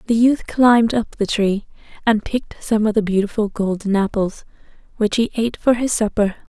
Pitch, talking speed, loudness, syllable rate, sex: 220 Hz, 185 wpm, -19 LUFS, 5.2 syllables/s, female